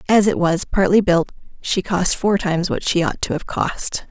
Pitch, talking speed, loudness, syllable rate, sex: 185 Hz, 220 wpm, -19 LUFS, 4.8 syllables/s, female